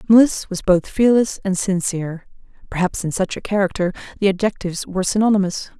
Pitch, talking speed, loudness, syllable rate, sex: 195 Hz, 155 wpm, -19 LUFS, 5.8 syllables/s, female